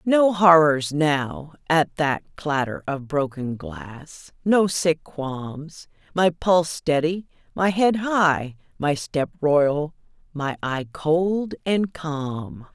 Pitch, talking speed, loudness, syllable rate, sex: 155 Hz, 120 wpm, -22 LUFS, 2.9 syllables/s, female